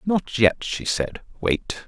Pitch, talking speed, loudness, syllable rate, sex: 130 Hz, 160 wpm, -23 LUFS, 3.1 syllables/s, male